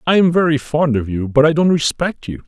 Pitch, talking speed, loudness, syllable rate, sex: 145 Hz, 265 wpm, -16 LUFS, 5.6 syllables/s, male